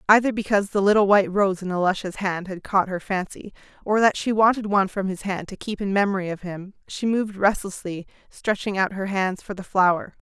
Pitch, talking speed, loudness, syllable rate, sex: 195 Hz, 215 wpm, -22 LUFS, 5.8 syllables/s, female